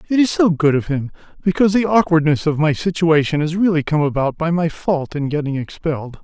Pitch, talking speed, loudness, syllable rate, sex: 160 Hz, 210 wpm, -18 LUFS, 5.8 syllables/s, male